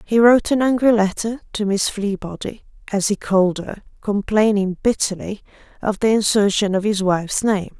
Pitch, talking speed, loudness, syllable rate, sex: 205 Hz, 160 wpm, -19 LUFS, 5.1 syllables/s, female